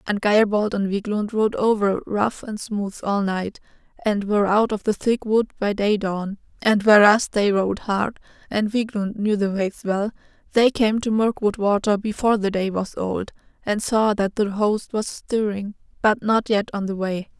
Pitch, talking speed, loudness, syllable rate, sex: 210 Hz, 190 wpm, -21 LUFS, 4.4 syllables/s, female